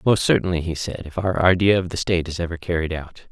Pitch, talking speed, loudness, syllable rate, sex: 85 Hz, 255 wpm, -21 LUFS, 6.3 syllables/s, male